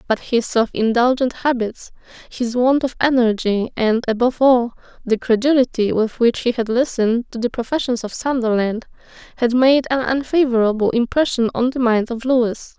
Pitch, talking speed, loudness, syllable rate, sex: 240 Hz, 155 wpm, -18 LUFS, 5.1 syllables/s, female